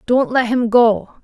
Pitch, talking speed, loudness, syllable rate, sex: 235 Hz, 195 wpm, -15 LUFS, 3.7 syllables/s, female